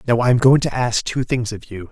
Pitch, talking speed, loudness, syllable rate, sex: 120 Hz, 315 wpm, -18 LUFS, 5.7 syllables/s, male